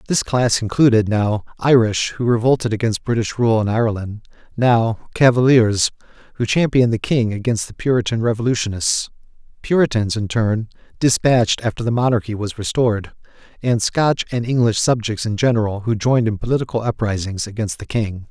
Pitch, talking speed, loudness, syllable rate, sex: 115 Hz, 150 wpm, -18 LUFS, 5.5 syllables/s, male